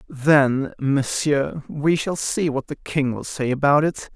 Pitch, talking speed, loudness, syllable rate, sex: 145 Hz, 175 wpm, -21 LUFS, 3.7 syllables/s, male